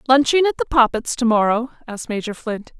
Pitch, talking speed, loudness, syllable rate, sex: 245 Hz, 195 wpm, -19 LUFS, 6.4 syllables/s, female